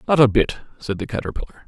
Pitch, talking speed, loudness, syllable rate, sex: 120 Hz, 215 wpm, -21 LUFS, 7.6 syllables/s, male